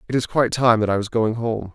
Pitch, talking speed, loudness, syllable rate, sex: 115 Hz, 310 wpm, -20 LUFS, 6.4 syllables/s, male